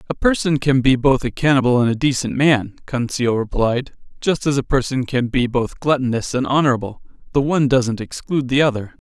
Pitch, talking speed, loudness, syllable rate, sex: 130 Hz, 190 wpm, -18 LUFS, 5.6 syllables/s, male